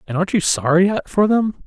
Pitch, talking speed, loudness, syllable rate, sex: 185 Hz, 215 wpm, -17 LUFS, 5.7 syllables/s, male